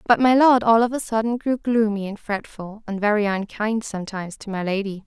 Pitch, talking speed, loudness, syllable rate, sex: 215 Hz, 215 wpm, -21 LUFS, 5.5 syllables/s, female